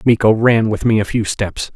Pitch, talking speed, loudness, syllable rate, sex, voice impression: 110 Hz, 240 wpm, -15 LUFS, 4.9 syllables/s, male, masculine, adult-like, slightly thick, fluent, slightly refreshing, sincere, slightly friendly